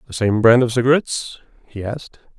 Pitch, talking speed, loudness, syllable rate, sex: 120 Hz, 175 wpm, -17 LUFS, 6.0 syllables/s, male